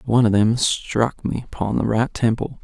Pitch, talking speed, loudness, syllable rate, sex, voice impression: 115 Hz, 205 wpm, -20 LUFS, 4.9 syllables/s, male, very masculine, adult-like, slightly dark, cool, very calm, slightly sweet, kind